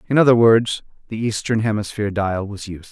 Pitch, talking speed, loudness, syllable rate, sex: 110 Hz, 185 wpm, -19 LUFS, 6.4 syllables/s, male